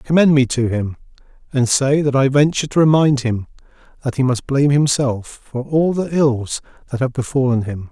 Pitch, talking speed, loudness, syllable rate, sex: 135 Hz, 190 wpm, -17 LUFS, 5.2 syllables/s, male